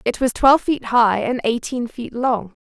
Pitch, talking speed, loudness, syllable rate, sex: 240 Hz, 205 wpm, -18 LUFS, 4.6 syllables/s, female